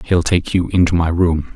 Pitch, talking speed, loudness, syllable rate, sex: 85 Hz, 230 wpm, -16 LUFS, 4.8 syllables/s, male